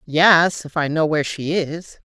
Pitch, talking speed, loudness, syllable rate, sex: 160 Hz, 200 wpm, -18 LUFS, 4.2 syllables/s, female